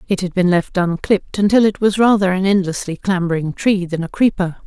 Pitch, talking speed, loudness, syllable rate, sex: 190 Hz, 205 wpm, -17 LUFS, 5.7 syllables/s, female